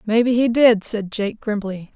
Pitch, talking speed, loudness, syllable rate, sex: 220 Hz, 185 wpm, -19 LUFS, 4.3 syllables/s, female